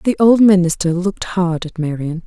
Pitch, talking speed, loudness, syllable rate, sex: 180 Hz, 185 wpm, -15 LUFS, 5.2 syllables/s, female